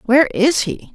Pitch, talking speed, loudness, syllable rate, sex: 255 Hz, 190 wpm, -16 LUFS, 5.0 syllables/s, female